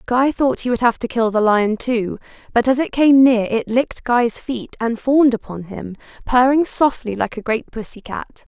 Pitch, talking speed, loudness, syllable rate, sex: 240 Hz, 210 wpm, -18 LUFS, 4.7 syllables/s, female